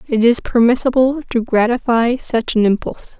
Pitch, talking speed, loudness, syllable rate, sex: 240 Hz, 150 wpm, -15 LUFS, 5.2 syllables/s, female